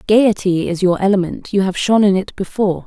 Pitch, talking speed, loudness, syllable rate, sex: 195 Hz, 210 wpm, -16 LUFS, 5.9 syllables/s, female